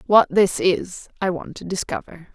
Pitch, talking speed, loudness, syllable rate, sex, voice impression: 180 Hz, 180 wpm, -21 LUFS, 4.5 syllables/s, female, feminine, slightly adult-like, slightly fluent, slightly sincere, slightly friendly, slightly sweet, slightly kind